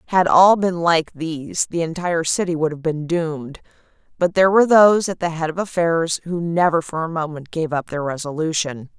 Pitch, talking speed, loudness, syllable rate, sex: 165 Hz, 200 wpm, -19 LUFS, 5.5 syllables/s, female